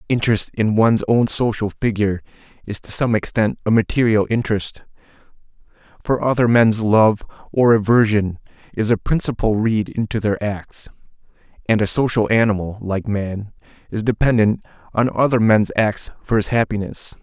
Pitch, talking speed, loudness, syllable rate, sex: 110 Hz, 145 wpm, -18 LUFS, 5.1 syllables/s, male